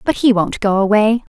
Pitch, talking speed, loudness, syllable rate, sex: 215 Hz, 225 wpm, -15 LUFS, 5.1 syllables/s, female